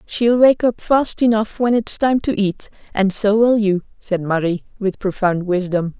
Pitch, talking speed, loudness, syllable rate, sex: 210 Hz, 190 wpm, -18 LUFS, 4.3 syllables/s, female